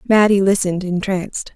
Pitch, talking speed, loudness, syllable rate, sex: 190 Hz, 115 wpm, -17 LUFS, 5.8 syllables/s, female